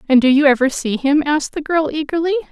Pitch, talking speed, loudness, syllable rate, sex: 290 Hz, 240 wpm, -16 LUFS, 6.4 syllables/s, female